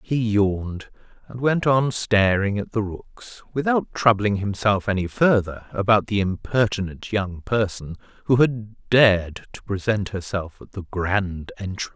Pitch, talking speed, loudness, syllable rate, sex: 105 Hz, 145 wpm, -22 LUFS, 4.3 syllables/s, male